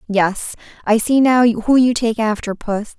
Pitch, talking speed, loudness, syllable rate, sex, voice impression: 225 Hz, 180 wpm, -16 LUFS, 4.0 syllables/s, female, feminine, slightly young, slightly soft, cute, friendly, kind